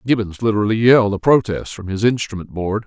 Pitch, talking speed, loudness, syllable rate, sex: 105 Hz, 190 wpm, -17 LUFS, 6.3 syllables/s, male